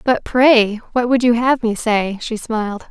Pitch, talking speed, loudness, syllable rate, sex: 230 Hz, 205 wpm, -16 LUFS, 4.2 syllables/s, female